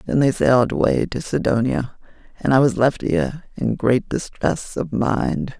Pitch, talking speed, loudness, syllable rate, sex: 130 Hz, 170 wpm, -20 LUFS, 4.5 syllables/s, female